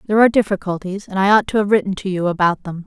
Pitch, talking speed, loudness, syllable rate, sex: 195 Hz, 270 wpm, -17 LUFS, 7.4 syllables/s, female